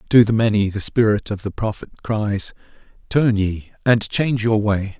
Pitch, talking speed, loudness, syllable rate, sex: 105 Hz, 180 wpm, -19 LUFS, 4.6 syllables/s, male